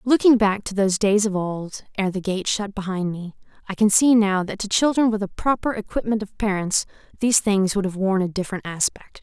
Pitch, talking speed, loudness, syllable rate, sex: 200 Hz, 220 wpm, -21 LUFS, 5.5 syllables/s, female